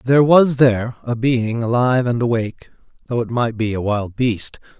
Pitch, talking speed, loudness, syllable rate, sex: 120 Hz, 190 wpm, -18 LUFS, 5.1 syllables/s, male